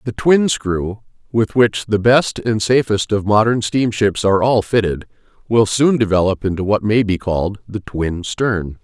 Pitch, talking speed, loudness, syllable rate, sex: 110 Hz, 185 wpm, -16 LUFS, 4.4 syllables/s, male